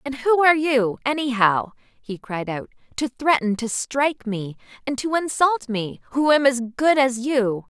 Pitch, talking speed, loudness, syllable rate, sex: 250 Hz, 175 wpm, -21 LUFS, 4.3 syllables/s, female